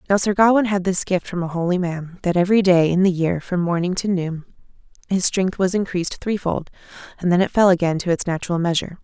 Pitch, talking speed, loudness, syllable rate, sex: 180 Hz, 225 wpm, -20 LUFS, 6.1 syllables/s, female